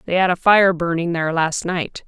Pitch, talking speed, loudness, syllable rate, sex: 175 Hz, 230 wpm, -18 LUFS, 5.2 syllables/s, female